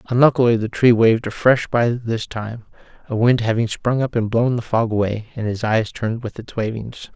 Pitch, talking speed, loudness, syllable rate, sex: 115 Hz, 210 wpm, -19 LUFS, 5.2 syllables/s, male